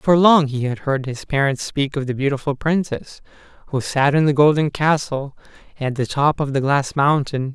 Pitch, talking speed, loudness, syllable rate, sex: 140 Hz, 200 wpm, -19 LUFS, 4.9 syllables/s, male